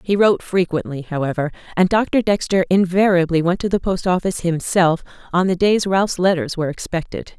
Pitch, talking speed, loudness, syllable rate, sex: 180 Hz, 170 wpm, -18 LUFS, 5.7 syllables/s, female